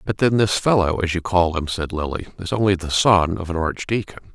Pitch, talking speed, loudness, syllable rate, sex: 90 Hz, 235 wpm, -20 LUFS, 5.3 syllables/s, male